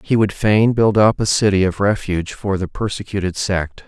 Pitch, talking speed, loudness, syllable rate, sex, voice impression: 100 Hz, 200 wpm, -17 LUFS, 5.0 syllables/s, male, very masculine, very adult-like, slightly old, very thick, tensed, powerful, slightly dark, slightly hard, slightly muffled, fluent, very cool, very intellectual, sincere, very calm, very mature, very friendly, very reassuring, unique, elegant, wild, slightly sweet, slightly lively, kind, slightly modest